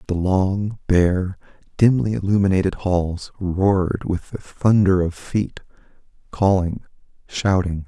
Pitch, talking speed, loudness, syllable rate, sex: 95 Hz, 105 wpm, -20 LUFS, 3.8 syllables/s, male